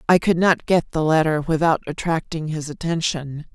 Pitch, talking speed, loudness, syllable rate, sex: 160 Hz, 170 wpm, -20 LUFS, 4.9 syllables/s, female